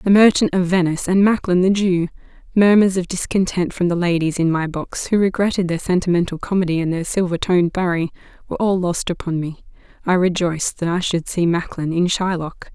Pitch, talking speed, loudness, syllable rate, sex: 180 Hz, 190 wpm, -19 LUFS, 5.8 syllables/s, female